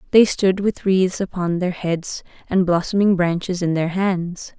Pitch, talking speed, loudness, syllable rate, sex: 180 Hz, 170 wpm, -20 LUFS, 4.2 syllables/s, female